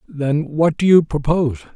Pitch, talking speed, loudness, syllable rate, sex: 150 Hz, 170 wpm, -17 LUFS, 4.9 syllables/s, male